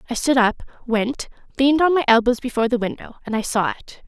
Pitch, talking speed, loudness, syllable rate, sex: 245 Hz, 220 wpm, -19 LUFS, 6.3 syllables/s, female